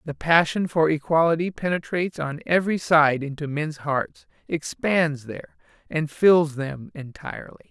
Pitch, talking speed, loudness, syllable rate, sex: 155 Hz, 130 wpm, -22 LUFS, 4.7 syllables/s, male